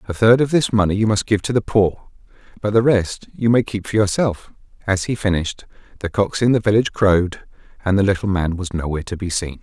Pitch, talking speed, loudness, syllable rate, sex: 100 Hz, 230 wpm, -19 LUFS, 6.0 syllables/s, male